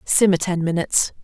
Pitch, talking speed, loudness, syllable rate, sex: 180 Hz, 145 wpm, -19 LUFS, 5.7 syllables/s, female